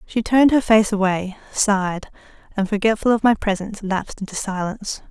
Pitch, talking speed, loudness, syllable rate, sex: 205 Hz, 165 wpm, -20 LUFS, 5.8 syllables/s, female